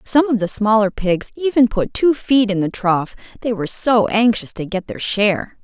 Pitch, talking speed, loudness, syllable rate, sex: 220 Hz, 215 wpm, -17 LUFS, 4.9 syllables/s, female